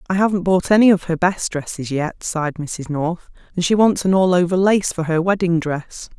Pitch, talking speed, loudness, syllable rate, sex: 175 Hz, 225 wpm, -18 LUFS, 5.1 syllables/s, female